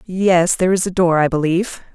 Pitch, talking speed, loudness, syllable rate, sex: 175 Hz, 215 wpm, -16 LUFS, 5.8 syllables/s, female